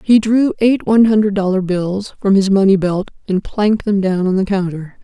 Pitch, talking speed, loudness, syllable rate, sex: 200 Hz, 215 wpm, -15 LUFS, 5.2 syllables/s, female